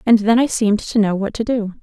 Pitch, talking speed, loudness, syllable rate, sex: 215 Hz, 295 wpm, -17 LUFS, 6.1 syllables/s, female